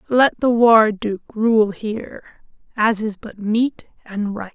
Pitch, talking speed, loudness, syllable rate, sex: 220 Hz, 160 wpm, -18 LUFS, 3.4 syllables/s, female